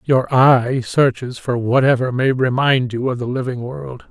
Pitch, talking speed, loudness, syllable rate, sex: 130 Hz, 175 wpm, -17 LUFS, 4.2 syllables/s, male